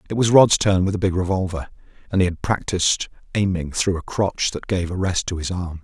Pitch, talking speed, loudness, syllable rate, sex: 95 Hz, 235 wpm, -21 LUFS, 5.6 syllables/s, male